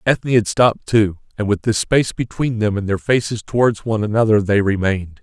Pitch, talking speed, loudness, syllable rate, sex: 110 Hz, 205 wpm, -18 LUFS, 5.9 syllables/s, male